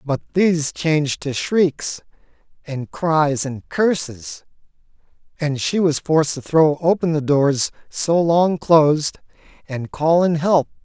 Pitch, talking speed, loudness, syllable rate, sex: 155 Hz, 140 wpm, -19 LUFS, 3.8 syllables/s, male